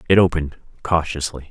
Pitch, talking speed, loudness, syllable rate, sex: 80 Hz, 120 wpm, -20 LUFS, 6.4 syllables/s, male